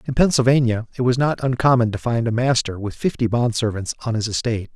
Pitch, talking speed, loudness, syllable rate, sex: 120 Hz, 215 wpm, -20 LUFS, 6.1 syllables/s, male